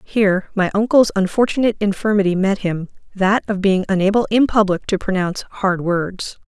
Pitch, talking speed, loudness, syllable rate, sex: 200 Hz, 150 wpm, -18 LUFS, 5.3 syllables/s, female